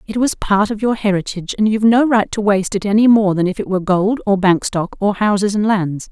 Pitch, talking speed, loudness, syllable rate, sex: 205 Hz, 265 wpm, -16 LUFS, 5.9 syllables/s, female